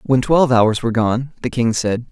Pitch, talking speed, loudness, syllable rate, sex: 125 Hz, 225 wpm, -17 LUFS, 5.3 syllables/s, male